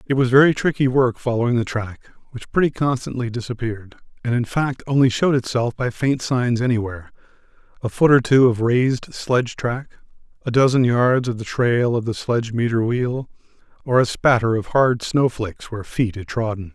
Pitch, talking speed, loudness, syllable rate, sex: 120 Hz, 185 wpm, -20 LUFS, 5.3 syllables/s, male